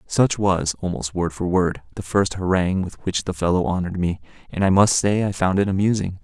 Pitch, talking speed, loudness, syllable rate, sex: 95 Hz, 220 wpm, -21 LUFS, 5.6 syllables/s, male